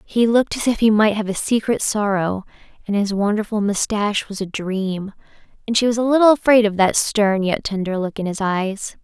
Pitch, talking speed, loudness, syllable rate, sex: 210 Hz, 210 wpm, -19 LUFS, 5.3 syllables/s, female